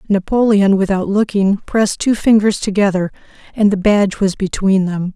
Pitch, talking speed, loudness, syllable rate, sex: 200 Hz, 150 wpm, -15 LUFS, 5.1 syllables/s, female